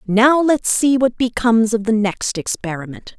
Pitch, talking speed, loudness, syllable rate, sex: 230 Hz, 170 wpm, -17 LUFS, 4.6 syllables/s, female